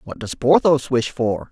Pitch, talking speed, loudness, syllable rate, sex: 130 Hz, 200 wpm, -18 LUFS, 4.3 syllables/s, male